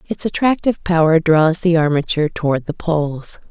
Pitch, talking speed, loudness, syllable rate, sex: 165 Hz, 155 wpm, -16 LUFS, 5.5 syllables/s, female